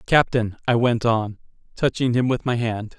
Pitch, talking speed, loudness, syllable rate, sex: 120 Hz, 180 wpm, -21 LUFS, 4.6 syllables/s, male